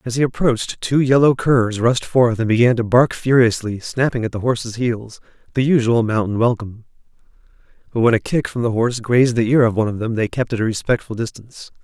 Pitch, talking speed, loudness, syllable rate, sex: 120 Hz, 215 wpm, -18 LUFS, 6.0 syllables/s, male